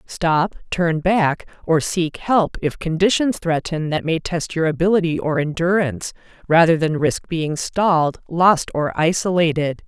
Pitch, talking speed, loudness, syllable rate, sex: 165 Hz, 145 wpm, -19 LUFS, 4.2 syllables/s, female